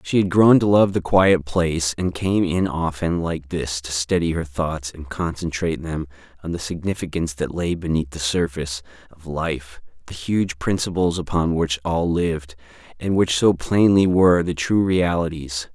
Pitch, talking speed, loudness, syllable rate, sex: 85 Hz, 170 wpm, -21 LUFS, 4.7 syllables/s, male